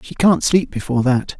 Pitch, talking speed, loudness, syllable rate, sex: 145 Hz, 215 wpm, -17 LUFS, 5.4 syllables/s, male